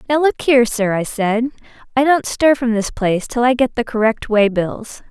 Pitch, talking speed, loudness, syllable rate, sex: 235 Hz, 225 wpm, -17 LUFS, 5.0 syllables/s, female